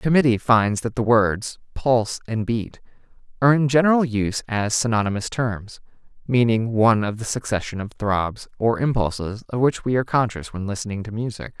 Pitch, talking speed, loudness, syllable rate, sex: 115 Hz, 175 wpm, -21 LUFS, 5.5 syllables/s, male